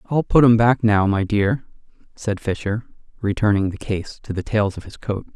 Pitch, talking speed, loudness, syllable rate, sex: 105 Hz, 200 wpm, -20 LUFS, 4.9 syllables/s, male